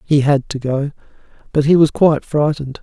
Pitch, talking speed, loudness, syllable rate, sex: 145 Hz, 190 wpm, -16 LUFS, 5.7 syllables/s, male